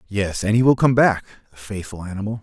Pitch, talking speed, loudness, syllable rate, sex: 105 Hz, 225 wpm, -19 LUFS, 6.0 syllables/s, male